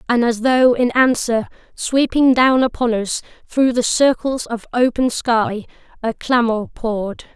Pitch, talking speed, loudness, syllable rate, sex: 240 Hz, 145 wpm, -17 LUFS, 4.1 syllables/s, female